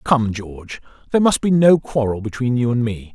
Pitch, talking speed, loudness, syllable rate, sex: 125 Hz, 210 wpm, -18 LUFS, 5.5 syllables/s, male